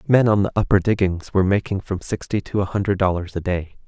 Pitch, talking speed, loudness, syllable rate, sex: 95 Hz, 230 wpm, -21 LUFS, 6.0 syllables/s, male